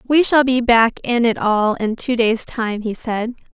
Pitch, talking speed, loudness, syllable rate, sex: 235 Hz, 220 wpm, -17 LUFS, 4.3 syllables/s, female